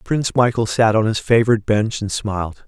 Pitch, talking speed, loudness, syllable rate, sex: 110 Hz, 200 wpm, -18 LUFS, 5.9 syllables/s, male